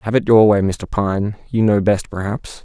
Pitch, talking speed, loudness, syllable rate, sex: 105 Hz, 225 wpm, -17 LUFS, 4.5 syllables/s, male